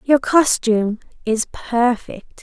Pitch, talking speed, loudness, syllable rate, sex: 240 Hz, 100 wpm, -18 LUFS, 3.5 syllables/s, female